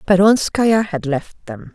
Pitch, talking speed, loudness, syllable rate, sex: 180 Hz, 140 wpm, -16 LUFS, 3.8 syllables/s, female